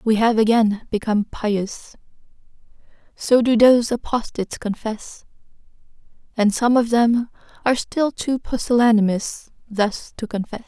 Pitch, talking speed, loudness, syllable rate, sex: 225 Hz, 110 wpm, -20 LUFS, 4.6 syllables/s, female